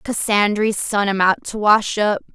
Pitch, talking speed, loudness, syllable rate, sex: 205 Hz, 180 wpm, -18 LUFS, 4.2 syllables/s, female